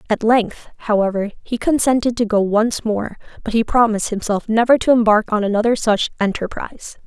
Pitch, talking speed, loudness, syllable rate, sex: 220 Hz, 170 wpm, -17 LUFS, 5.5 syllables/s, female